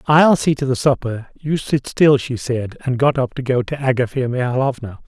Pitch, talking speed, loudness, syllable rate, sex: 130 Hz, 215 wpm, -18 LUFS, 5.0 syllables/s, male